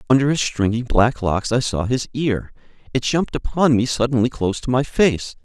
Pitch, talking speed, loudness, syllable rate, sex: 125 Hz, 200 wpm, -19 LUFS, 5.3 syllables/s, male